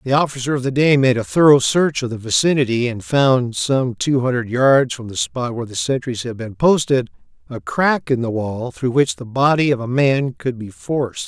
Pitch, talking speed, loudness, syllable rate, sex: 130 Hz, 225 wpm, -18 LUFS, 5.0 syllables/s, male